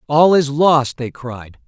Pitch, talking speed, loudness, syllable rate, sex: 140 Hz, 180 wpm, -15 LUFS, 3.4 syllables/s, male